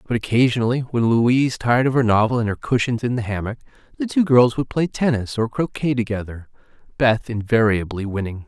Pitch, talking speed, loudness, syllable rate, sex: 120 Hz, 175 wpm, -20 LUFS, 5.8 syllables/s, male